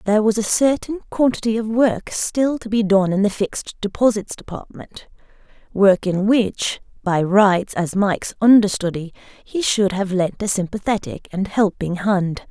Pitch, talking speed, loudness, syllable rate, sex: 205 Hz, 155 wpm, -19 LUFS, 4.5 syllables/s, female